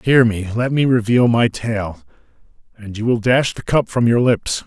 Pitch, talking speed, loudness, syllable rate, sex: 115 Hz, 205 wpm, -17 LUFS, 4.5 syllables/s, male